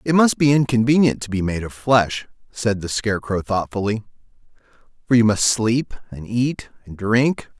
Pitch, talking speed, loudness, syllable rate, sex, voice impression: 115 Hz, 165 wpm, -19 LUFS, 4.7 syllables/s, male, very masculine, adult-like, thick, tensed, powerful, bright, slightly hard, clear, fluent, cool, very intellectual, refreshing, very sincere, calm, slightly mature, very friendly, reassuring, slightly unique, elegant, slightly wild, sweet, lively, kind, slightly intense